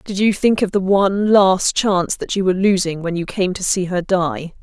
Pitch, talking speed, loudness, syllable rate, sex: 190 Hz, 245 wpm, -17 LUFS, 5.1 syllables/s, female